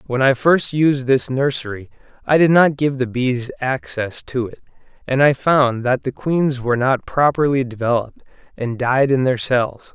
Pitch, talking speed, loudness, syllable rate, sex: 130 Hz, 180 wpm, -18 LUFS, 4.6 syllables/s, male